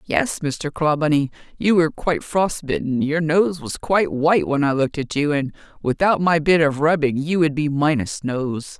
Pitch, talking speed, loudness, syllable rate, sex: 155 Hz, 190 wpm, -20 LUFS, 4.9 syllables/s, female